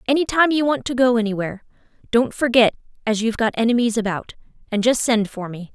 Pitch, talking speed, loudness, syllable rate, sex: 230 Hz, 200 wpm, -20 LUFS, 6.2 syllables/s, female